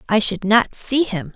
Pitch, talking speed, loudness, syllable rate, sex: 225 Hz, 220 wpm, -18 LUFS, 4.2 syllables/s, female